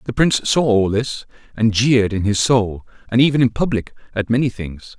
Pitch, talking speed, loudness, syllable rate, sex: 115 Hz, 205 wpm, -18 LUFS, 5.4 syllables/s, male